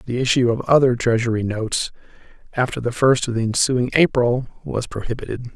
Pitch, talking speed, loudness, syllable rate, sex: 120 Hz, 160 wpm, -20 LUFS, 5.7 syllables/s, male